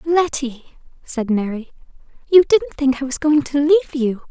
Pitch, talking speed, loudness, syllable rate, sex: 275 Hz, 165 wpm, -18 LUFS, 5.0 syllables/s, female